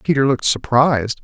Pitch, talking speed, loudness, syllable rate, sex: 130 Hz, 145 wpm, -16 LUFS, 6.2 syllables/s, male